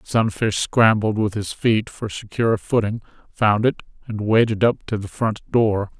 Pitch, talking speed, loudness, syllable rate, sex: 110 Hz, 170 wpm, -20 LUFS, 4.4 syllables/s, male